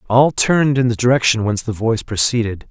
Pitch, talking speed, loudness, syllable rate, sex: 115 Hz, 200 wpm, -16 LUFS, 6.3 syllables/s, male